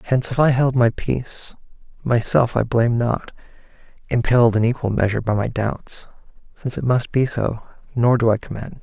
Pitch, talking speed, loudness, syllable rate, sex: 120 Hz, 175 wpm, -20 LUFS, 5.5 syllables/s, male